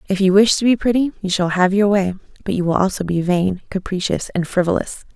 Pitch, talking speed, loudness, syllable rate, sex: 190 Hz, 235 wpm, -18 LUFS, 5.9 syllables/s, female